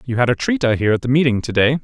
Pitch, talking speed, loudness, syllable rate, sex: 130 Hz, 360 wpm, -17 LUFS, 6.9 syllables/s, male